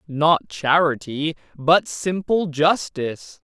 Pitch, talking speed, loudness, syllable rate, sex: 155 Hz, 85 wpm, -20 LUFS, 3.3 syllables/s, male